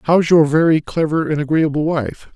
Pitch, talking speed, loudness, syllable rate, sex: 155 Hz, 180 wpm, -16 LUFS, 4.8 syllables/s, male